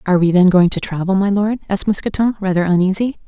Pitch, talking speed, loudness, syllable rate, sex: 195 Hz, 220 wpm, -16 LUFS, 6.8 syllables/s, female